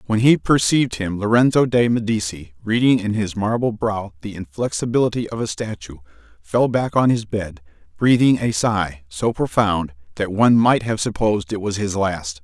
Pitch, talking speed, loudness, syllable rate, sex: 105 Hz, 175 wpm, -19 LUFS, 5.0 syllables/s, male